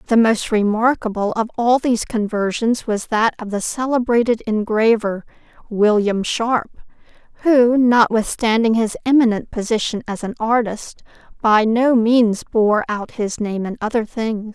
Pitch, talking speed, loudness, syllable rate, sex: 225 Hz, 135 wpm, -18 LUFS, 4.4 syllables/s, female